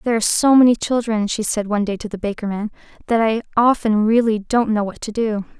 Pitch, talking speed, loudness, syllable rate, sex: 220 Hz, 245 wpm, -18 LUFS, 6.4 syllables/s, female